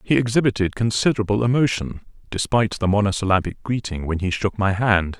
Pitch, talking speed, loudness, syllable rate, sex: 105 Hz, 150 wpm, -21 LUFS, 6.0 syllables/s, male